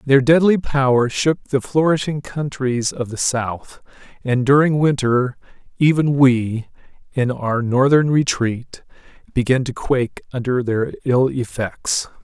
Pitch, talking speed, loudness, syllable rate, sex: 130 Hz, 130 wpm, -18 LUFS, 4.0 syllables/s, male